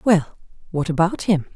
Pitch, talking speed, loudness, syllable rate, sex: 175 Hz, 155 wpm, -21 LUFS, 4.6 syllables/s, female